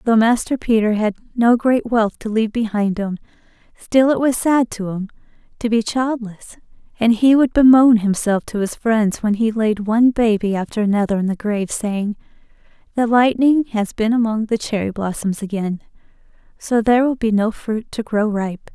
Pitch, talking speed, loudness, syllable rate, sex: 220 Hz, 180 wpm, -18 LUFS, 5.1 syllables/s, female